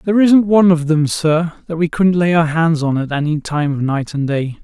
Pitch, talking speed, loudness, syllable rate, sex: 160 Hz, 260 wpm, -15 LUFS, 5.3 syllables/s, male